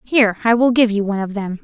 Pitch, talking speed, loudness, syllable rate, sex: 215 Hz, 295 wpm, -16 LUFS, 6.8 syllables/s, female